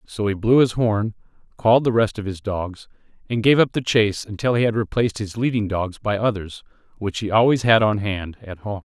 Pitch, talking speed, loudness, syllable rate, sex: 105 Hz, 220 wpm, -20 LUFS, 5.5 syllables/s, male